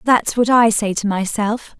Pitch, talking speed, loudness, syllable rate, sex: 220 Hz, 200 wpm, -17 LUFS, 4.2 syllables/s, female